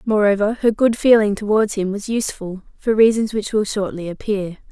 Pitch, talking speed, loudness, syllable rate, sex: 210 Hz, 180 wpm, -18 LUFS, 5.3 syllables/s, female